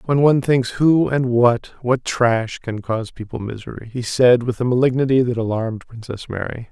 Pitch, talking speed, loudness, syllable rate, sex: 120 Hz, 170 wpm, -19 LUFS, 5.1 syllables/s, male